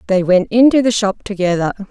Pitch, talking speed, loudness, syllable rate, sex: 205 Hz, 190 wpm, -14 LUFS, 5.9 syllables/s, female